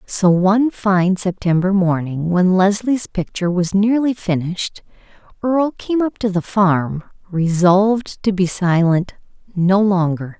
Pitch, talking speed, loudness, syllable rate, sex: 190 Hz, 135 wpm, -17 LUFS, 4.2 syllables/s, female